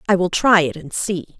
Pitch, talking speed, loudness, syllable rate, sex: 180 Hz, 260 wpm, -18 LUFS, 5.4 syllables/s, female